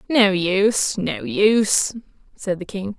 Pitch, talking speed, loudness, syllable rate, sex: 200 Hz, 140 wpm, -19 LUFS, 3.7 syllables/s, female